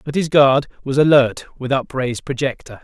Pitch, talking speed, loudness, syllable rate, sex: 135 Hz, 170 wpm, -17 LUFS, 5.3 syllables/s, male